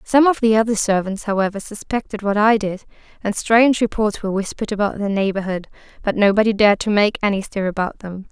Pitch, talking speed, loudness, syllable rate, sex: 205 Hz, 195 wpm, -18 LUFS, 6.2 syllables/s, female